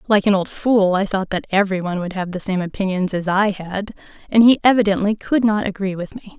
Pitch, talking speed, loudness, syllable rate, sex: 195 Hz, 235 wpm, -18 LUFS, 5.9 syllables/s, female